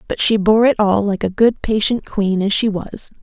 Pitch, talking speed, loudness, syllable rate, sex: 210 Hz, 240 wpm, -16 LUFS, 4.7 syllables/s, female